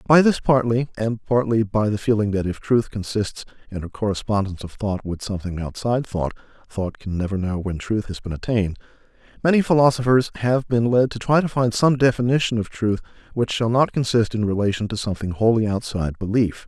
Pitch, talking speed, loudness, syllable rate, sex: 110 Hz, 185 wpm, -21 LUFS, 5.8 syllables/s, male